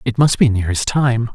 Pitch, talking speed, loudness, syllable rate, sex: 115 Hz, 265 wpm, -16 LUFS, 4.9 syllables/s, male